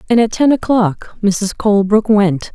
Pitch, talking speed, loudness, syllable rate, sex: 210 Hz, 165 wpm, -14 LUFS, 4.6 syllables/s, female